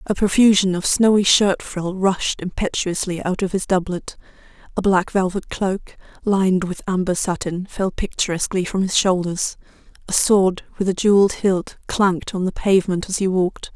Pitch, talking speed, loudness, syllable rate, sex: 190 Hz, 165 wpm, -19 LUFS, 5.0 syllables/s, female